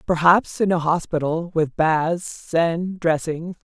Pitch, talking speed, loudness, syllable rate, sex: 165 Hz, 130 wpm, -21 LUFS, 3.5 syllables/s, female